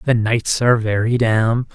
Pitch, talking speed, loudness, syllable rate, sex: 115 Hz, 170 wpm, -17 LUFS, 4.3 syllables/s, male